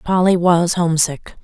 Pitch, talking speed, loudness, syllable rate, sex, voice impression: 175 Hz, 125 wpm, -16 LUFS, 4.4 syllables/s, female, very feminine, adult-like, thin, tensed, slightly powerful, bright, slightly soft, clear, fluent, slightly raspy, cute, slightly cool, intellectual, refreshing, sincere, calm, reassuring, unique, elegant, slightly wild, sweet, lively, slightly strict, slightly sharp, light